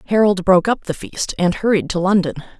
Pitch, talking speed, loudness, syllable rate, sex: 190 Hz, 210 wpm, -17 LUFS, 6.1 syllables/s, female